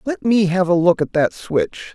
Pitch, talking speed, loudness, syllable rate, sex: 180 Hz, 245 wpm, -18 LUFS, 4.4 syllables/s, male